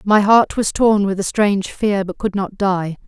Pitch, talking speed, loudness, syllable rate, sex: 200 Hz, 235 wpm, -17 LUFS, 4.5 syllables/s, female